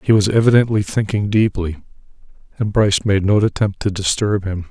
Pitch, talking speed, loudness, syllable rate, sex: 100 Hz, 165 wpm, -17 LUFS, 5.5 syllables/s, male